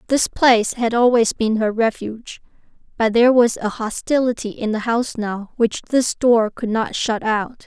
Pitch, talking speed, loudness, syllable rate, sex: 230 Hz, 180 wpm, -18 LUFS, 4.8 syllables/s, female